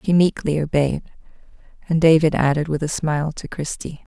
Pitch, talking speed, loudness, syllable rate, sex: 155 Hz, 160 wpm, -20 LUFS, 5.4 syllables/s, female